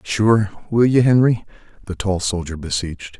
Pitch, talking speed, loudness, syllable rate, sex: 100 Hz, 130 wpm, -18 LUFS, 4.9 syllables/s, male